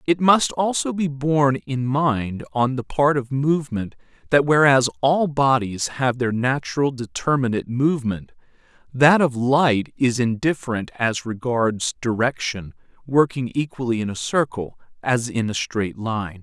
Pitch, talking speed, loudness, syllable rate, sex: 130 Hz, 145 wpm, -21 LUFS, 4.3 syllables/s, male